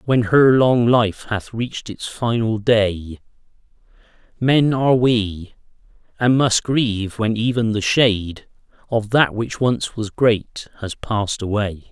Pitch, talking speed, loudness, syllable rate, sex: 110 Hz, 140 wpm, -18 LUFS, 3.7 syllables/s, male